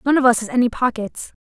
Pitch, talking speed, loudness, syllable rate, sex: 240 Hz, 250 wpm, -19 LUFS, 6.5 syllables/s, female